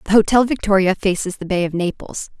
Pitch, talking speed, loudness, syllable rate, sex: 195 Hz, 200 wpm, -18 LUFS, 5.9 syllables/s, female